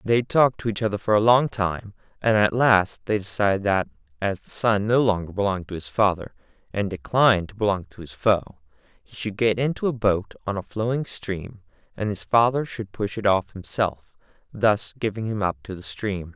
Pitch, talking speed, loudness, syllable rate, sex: 105 Hz, 205 wpm, -23 LUFS, 5.2 syllables/s, male